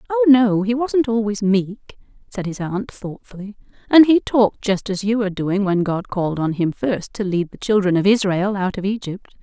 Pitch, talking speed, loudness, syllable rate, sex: 205 Hz, 210 wpm, -19 LUFS, 4.9 syllables/s, female